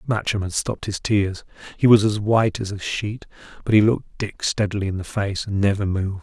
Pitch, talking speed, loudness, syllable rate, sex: 100 Hz, 220 wpm, -21 LUFS, 5.7 syllables/s, male